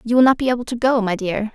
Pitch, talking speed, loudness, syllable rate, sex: 235 Hz, 350 wpm, -18 LUFS, 6.9 syllables/s, female